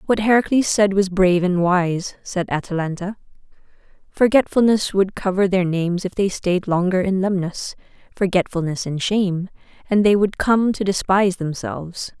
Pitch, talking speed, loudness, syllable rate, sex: 190 Hz, 145 wpm, -19 LUFS, 5.0 syllables/s, female